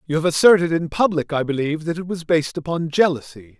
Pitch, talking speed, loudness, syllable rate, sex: 160 Hz, 215 wpm, -19 LUFS, 6.5 syllables/s, male